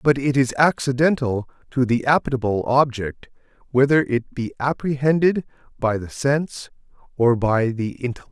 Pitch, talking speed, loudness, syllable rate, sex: 130 Hz, 135 wpm, -21 LUFS, 4.9 syllables/s, male